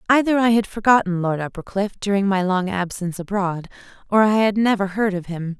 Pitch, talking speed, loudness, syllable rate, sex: 195 Hz, 195 wpm, -20 LUFS, 5.7 syllables/s, female